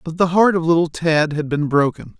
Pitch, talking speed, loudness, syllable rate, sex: 165 Hz, 245 wpm, -17 LUFS, 5.3 syllables/s, male